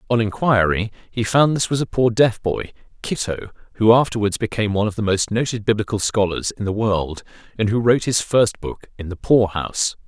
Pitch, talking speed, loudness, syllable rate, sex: 105 Hz, 205 wpm, -19 LUFS, 5.6 syllables/s, male